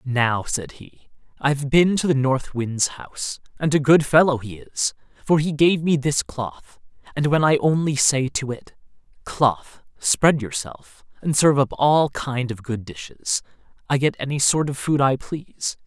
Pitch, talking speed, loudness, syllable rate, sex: 135 Hz, 180 wpm, -21 LUFS, 4.3 syllables/s, male